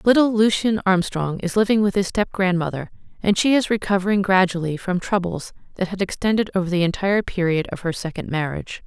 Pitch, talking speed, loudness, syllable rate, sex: 190 Hz, 185 wpm, -21 LUFS, 5.9 syllables/s, female